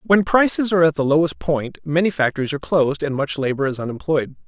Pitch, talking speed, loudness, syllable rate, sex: 150 Hz, 215 wpm, -19 LUFS, 6.4 syllables/s, male